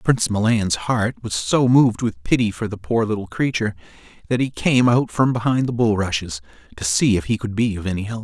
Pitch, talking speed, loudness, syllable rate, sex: 110 Hz, 220 wpm, -20 LUFS, 5.6 syllables/s, male